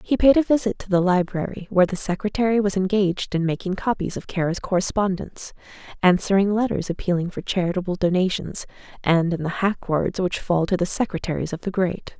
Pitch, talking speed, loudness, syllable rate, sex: 190 Hz, 180 wpm, -22 LUFS, 5.9 syllables/s, female